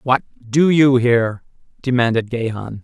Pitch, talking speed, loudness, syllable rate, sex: 125 Hz, 125 wpm, -17 LUFS, 4.6 syllables/s, male